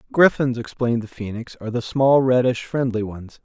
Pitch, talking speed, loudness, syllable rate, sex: 120 Hz, 175 wpm, -21 LUFS, 5.4 syllables/s, male